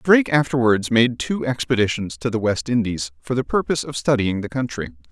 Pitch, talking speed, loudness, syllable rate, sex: 115 Hz, 190 wpm, -21 LUFS, 5.7 syllables/s, male